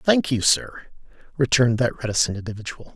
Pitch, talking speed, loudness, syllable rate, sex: 120 Hz, 140 wpm, -21 LUFS, 5.7 syllables/s, male